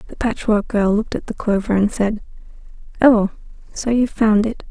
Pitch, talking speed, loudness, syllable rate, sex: 215 Hz, 180 wpm, -18 LUFS, 5.5 syllables/s, female